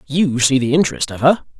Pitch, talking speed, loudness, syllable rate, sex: 145 Hz, 225 wpm, -16 LUFS, 6.2 syllables/s, male